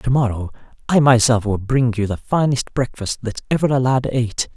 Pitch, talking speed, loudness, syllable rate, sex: 120 Hz, 195 wpm, -18 LUFS, 5.3 syllables/s, male